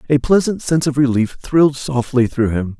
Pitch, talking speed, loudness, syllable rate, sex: 135 Hz, 195 wpm, -16 LUFS, 5.5 syllables/s, male